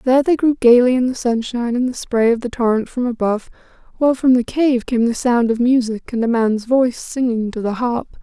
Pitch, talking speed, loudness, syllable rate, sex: 240 Hz, 235 wpm, -17 LUFS, 5.7 syllables/s, female